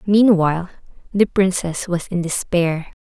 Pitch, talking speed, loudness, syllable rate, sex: 180 Hz, 120 wpm, -18 LUFS, 4.2 syllables/s, female